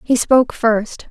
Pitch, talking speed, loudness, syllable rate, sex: 230 Hz, 165 wpm, -15 LUFS, 4.2 syllables/s, female